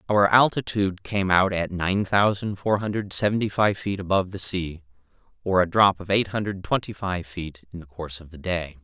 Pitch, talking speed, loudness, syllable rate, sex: 95 Hz, 205 wpm, -23 LUFS, 5.3 syllables/s, male